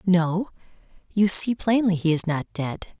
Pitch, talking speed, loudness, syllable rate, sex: 185 Hz, 160 wpm, -23 LUFS, 4.2 syllables/s, female